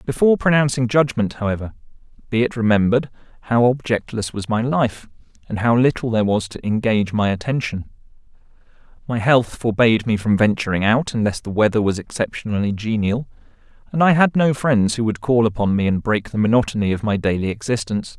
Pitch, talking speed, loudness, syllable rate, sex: 115 Hz, 170 wpm, -19 LUFS, 6.0 syllables/s, male